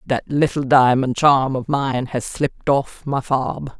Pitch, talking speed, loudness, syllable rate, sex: 135 Hz, 175 wpm, -19 LUFS, 3.8 syllables/s, female